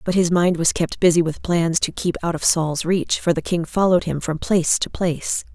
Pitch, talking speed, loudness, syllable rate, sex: 170 Hz, 250 wpm, -20 LUFS, 5.3 syllables/s, female